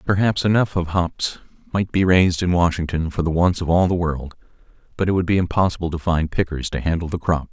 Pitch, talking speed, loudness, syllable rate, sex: 85 Hz, 225 wpm, -20 LUFS, 5.9 syllables/s, male